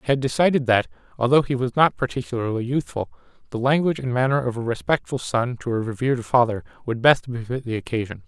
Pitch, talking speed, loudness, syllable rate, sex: 125 Hz, 195 wpm, -22 LUFS, 6.3 syllables/s, male